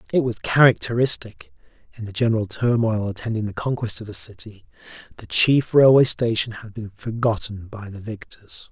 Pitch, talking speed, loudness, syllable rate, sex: 110 Hz, 150 wpm, -20 LUFS, 5.3 syllables/s, male